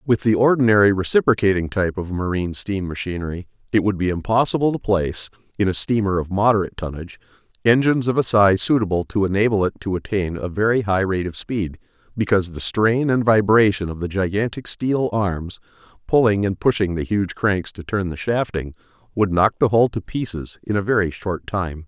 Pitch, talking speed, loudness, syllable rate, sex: 100 Hz, 185 wpm, -20 LUFS, 5.7 syllables/s, male